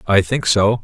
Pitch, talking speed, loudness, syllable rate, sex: 105 Hz, 215 wpm, -16 LUFS, 4.4 syllables/s, male